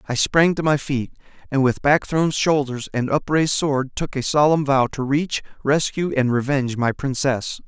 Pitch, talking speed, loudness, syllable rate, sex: 140 Hz, 190 wpm, -20 LUFS, 4.7 syllables/s, male